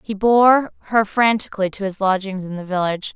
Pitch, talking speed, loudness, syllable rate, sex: 205 Hz, 190 wpm, -18 LUFS, 5.6 syllables/s, female